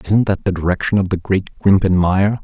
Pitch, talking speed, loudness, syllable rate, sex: 95 Hz, 220 wpm, -16 LUFS, 5.2 syllables/s, male